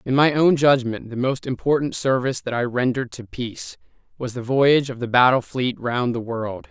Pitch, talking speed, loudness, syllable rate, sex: 125 Hz, 205 wpm, -21 LUFS, 5.3 syllables/s, male